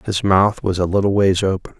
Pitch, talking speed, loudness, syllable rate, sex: 95 Hz, 235 wpm, -17 LUFS, 5.4 syllables/s, male